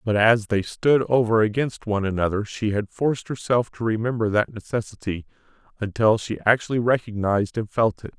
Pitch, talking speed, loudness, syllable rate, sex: 110 Hz, 170 wpm, -22 LUFS, 5.6 syllables/s, male